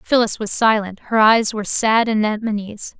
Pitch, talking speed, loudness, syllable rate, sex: 215 Hz, 160 wpm, -17 LUFS, 4.8 syllables/s, female